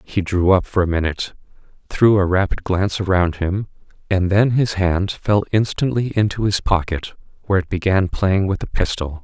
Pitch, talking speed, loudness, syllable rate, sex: 95 Hz, 180 wpm, -19 LUFS, 5.1 syllables/s, male